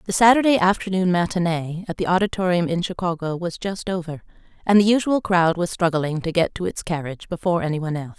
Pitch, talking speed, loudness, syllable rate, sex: 180 Hz, 200 wpm, -21 LUFS, 6.3 syllables/s, female